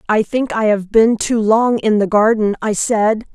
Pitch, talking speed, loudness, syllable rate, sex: 215 Hz, 215 wpm, -15 LUFS, 4.3 syllables/s, female